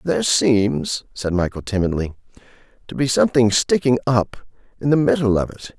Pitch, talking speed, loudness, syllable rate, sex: 115 Hz, 155 wpm, -19 LUFS, 5.1 syllables/s, male